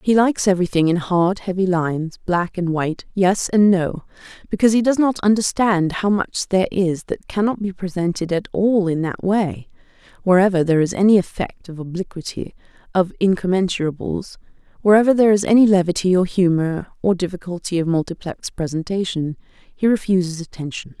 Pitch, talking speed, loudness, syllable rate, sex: 185 Hz, 155 wpm, -19 LUFS, 5.6 syllables/s, female